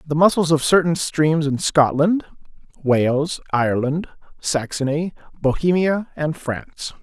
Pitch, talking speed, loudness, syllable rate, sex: 155 Hz, 110 wpm, -20 LUFS, 4.3 syllables/s, male